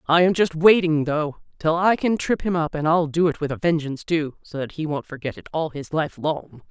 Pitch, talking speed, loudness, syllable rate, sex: 160 Hz, 260 wpm, -22 LUFS, 5.3 syllables/s, female